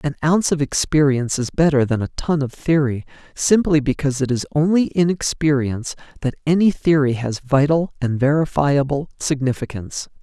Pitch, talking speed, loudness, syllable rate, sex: 145 Hz, 155 wpm, -19 LUFS, 5.4 syllables/s, male